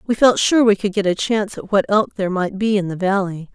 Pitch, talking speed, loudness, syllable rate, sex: 200 Hz, 290 wpm, -18 LUFS, 6.0 syllables/s, female